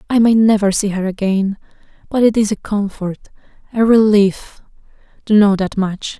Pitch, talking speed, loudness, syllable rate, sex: 205 Hz, 145 wpm, -15 LUFS, 4.9 syllables/s, female